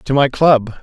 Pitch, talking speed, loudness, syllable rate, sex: 130 Hz, 220 wpm, -14 LUFS, 3.9 syllables/s, male